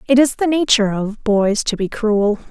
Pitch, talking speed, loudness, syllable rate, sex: 225 Hz, 215 wpm, -17 LUFS, 4.9 syllables/s, female